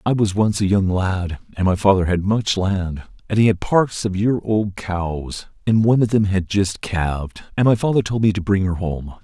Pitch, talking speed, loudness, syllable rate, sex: 100 Hz, 235 wpm, -19 LUFS, 4.8 syllables/s, male